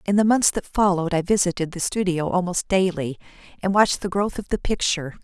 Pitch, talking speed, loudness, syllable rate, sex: 185 Hz, 205 wpm, -22 LUFS, 6.1 syllables/s, female